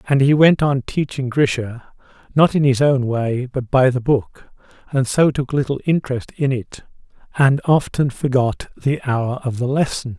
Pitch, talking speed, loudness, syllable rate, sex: 130 Hz, 175 wpm, -18 LUFS, 4.5 syllables/s, male